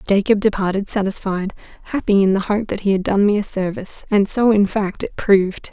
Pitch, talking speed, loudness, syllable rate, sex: 200 Hz, 200 wpm, -18 LUFS, 5.6 syllables/s, female